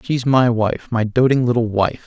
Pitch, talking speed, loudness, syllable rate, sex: 120 Hz, 205 wpm, -17 LUFS, 4.6 syllables/s, male